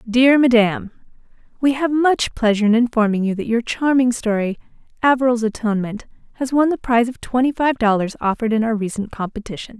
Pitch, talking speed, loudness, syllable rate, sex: 235 Hz, 170 wpm, -18 LUFS, 6.0 syllables/s, female